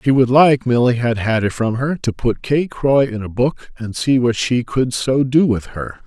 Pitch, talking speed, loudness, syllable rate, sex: 125 Hz, 230 wpm, -17 LUFS, 4.5 syllables/s, male